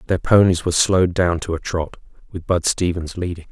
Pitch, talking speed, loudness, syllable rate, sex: 90 Hz, 205 wpm, -19 LUFS, 5.7 syllables/s, male